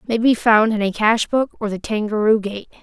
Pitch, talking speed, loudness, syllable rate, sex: 220 Hz, 235 wpm, -18 LUFS, 5.2 syllables/s, male